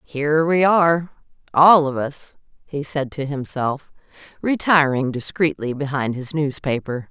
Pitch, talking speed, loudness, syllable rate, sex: 145 Hz, 125 wpm, -19 LUFS, 4.3 syllables/s, female